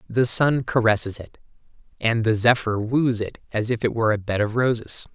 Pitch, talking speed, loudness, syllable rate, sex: 115 Hz, 200 wpm, -21 LUFS, 5.5 syllables/s, male